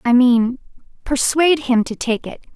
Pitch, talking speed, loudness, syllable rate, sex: 255 Hz, 165 wpm, -17 LUFS, 4.7 syllables/s, female